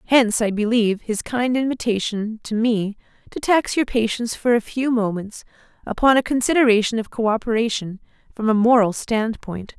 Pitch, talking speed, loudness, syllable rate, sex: 225 Hz, 155 wpm, -20 LUFS, 5.3 syllables/s, female